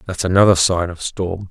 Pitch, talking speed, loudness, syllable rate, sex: 90 Hz, 200 wpm, -17 LUFS, 5.2 syllables/s, male